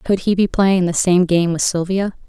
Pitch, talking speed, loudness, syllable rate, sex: 185 Hz, 235 wpm, -16 LUFS, 4.8 syllables/s, female